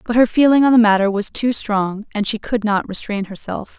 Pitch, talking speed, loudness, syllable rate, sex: 215 Hz, 240 wpm, -17 LUFS, 5.3 syllables/s, female